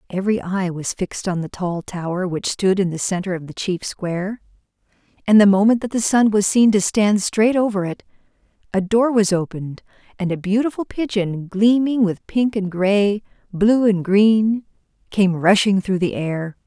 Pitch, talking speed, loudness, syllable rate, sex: 200 Hz, 185 wpm, -19 LUFS, 4.8 syllables/s, female